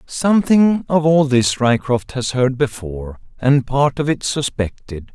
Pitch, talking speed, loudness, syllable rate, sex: 130 Hz, 150 wpm, -17 LUFS, 4.2 syllables/s, male